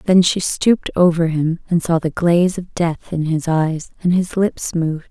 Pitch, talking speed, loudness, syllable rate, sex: 170 Hz, 210 wpm, -18 LUFS, 4.6 syllables/s, female